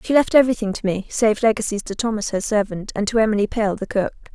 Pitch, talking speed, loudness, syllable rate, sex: 215 Hz, 235 wpm, -20 LUFS, 6.5 syllables/s, female